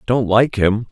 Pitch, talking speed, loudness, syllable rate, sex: 110 Hz, 200 wpm, -16 LUFS, 3.9 syllables/s, male